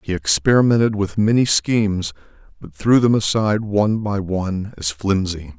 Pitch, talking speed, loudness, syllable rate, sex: 100 Hz, 150 wpm, -18 LUFS, 5.0 syllables/s, male